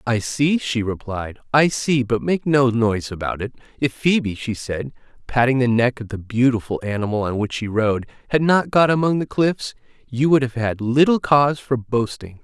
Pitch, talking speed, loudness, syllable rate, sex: 125 Hz, 195 wpm, -20 LUFS, 4.9 syllables/s, male